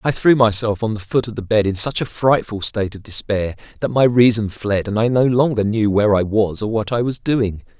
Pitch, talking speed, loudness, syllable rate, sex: 110 Hz, 255 wpm, -18 LUFS, 5.5 syllables/s, male